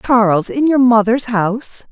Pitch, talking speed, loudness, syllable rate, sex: 230 Hz, 155 wpm, -14 LUFS, 4.6 syllables/s, female